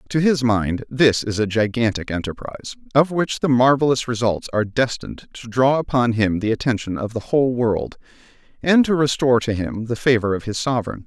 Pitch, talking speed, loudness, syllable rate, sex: 120 Hz, 190 wpm, -20 LUFS, 5.6 syllables/s, male